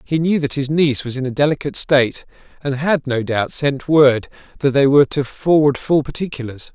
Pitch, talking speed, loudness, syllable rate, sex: 140 Hz, 205 wpm, -17 LUFS, 5.6 syllables/s, male